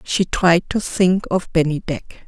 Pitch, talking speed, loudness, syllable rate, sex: 175 Hz, 160 wpm, -19 LUFS, 4.4 syllables/s, female